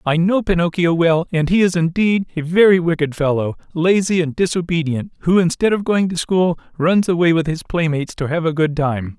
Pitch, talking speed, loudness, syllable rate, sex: 170 Hz, 205 wpm, -17 LUFS, 5.3 syllables/s, male